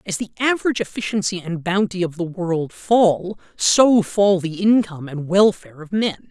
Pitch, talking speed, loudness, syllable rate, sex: 190 Hz, 170 wpm, -19 LUFS, 4.9 syllables/s, male